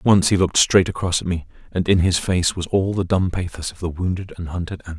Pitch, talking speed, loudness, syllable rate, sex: 90 Hz, 265 wpm, -20 LUFS, 6.3 syllables/s, male